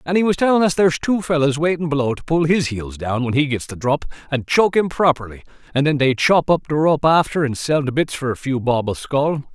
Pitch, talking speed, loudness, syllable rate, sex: 145 Hz, 265 wpm, -18 LUFS, 5.8 syllables/s, male